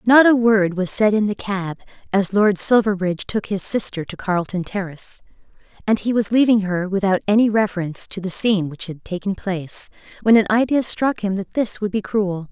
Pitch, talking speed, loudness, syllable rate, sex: 200 Hz, 200 wpm, -19 LUFS, 5.4 syllables/s, female